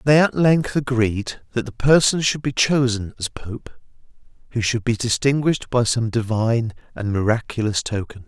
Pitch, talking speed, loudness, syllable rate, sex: 120 Hz, 160 wpm, -20 LUFS, 4.9 syllables/s, male